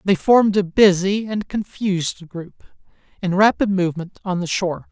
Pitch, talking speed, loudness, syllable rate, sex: 190 Hz, 160 wpm, -19 LUFS, 5.2 syllables/s, male